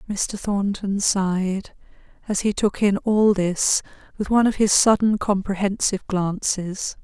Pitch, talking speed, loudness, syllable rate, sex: 200 Hz, 135 wpm, -21 LUFS, 4.2 syllables/s, female